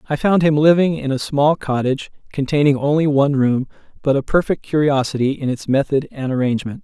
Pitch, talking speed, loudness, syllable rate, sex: 140 Hz, 185 wpm, -18 LUFS, 5.9 syllables/s, male